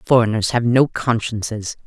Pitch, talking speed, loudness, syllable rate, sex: 115 Hz, 130 wpm, -18 LUFS, 4.7 syllables/s, female